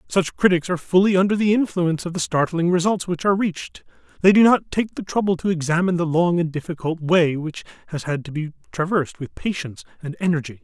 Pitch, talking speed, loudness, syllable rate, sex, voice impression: 170 Hz, 210 wpm, -21 LUFS, 6.3 syllables/s, male, masculine, slightly middle-aged, muffled, reassuring, slightly unique